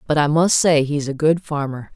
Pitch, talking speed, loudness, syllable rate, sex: 150 Hz, 245 wpm, -18 LUFS, 5.0 syllables/s, female